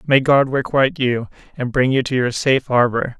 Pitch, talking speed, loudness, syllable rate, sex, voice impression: 130 Hz, 205 wpm, -17 LUFS, 5.4 syllables/s, male, masculine, adult-like, slightly powerful, bright, clear, raspy, slightly mature, friendly, unique, wild, lively, slightly kind